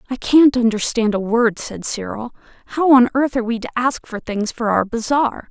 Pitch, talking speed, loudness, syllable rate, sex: 235 Hz, 205 wpm, -18 LUFS, 5.1 syllables/s, female